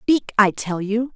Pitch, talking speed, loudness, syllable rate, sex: 220 Hz, 210 wpm, -20 LUFS, 4.4 syllables/s, female